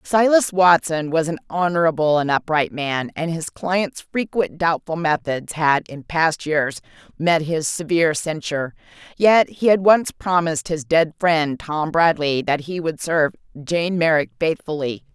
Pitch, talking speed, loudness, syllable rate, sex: 160 Hz, 155 wpm, -20 LUFS, 4.4 syllables/s, female